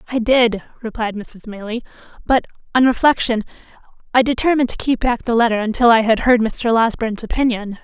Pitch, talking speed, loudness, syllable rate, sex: 230 Hz, 170 wpm, -17 LUFS, 5.9 syllables/s, female